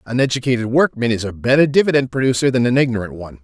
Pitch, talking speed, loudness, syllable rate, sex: 125 Hz, 210 wpm, -17 LUFS, 7.3 syllables/s, male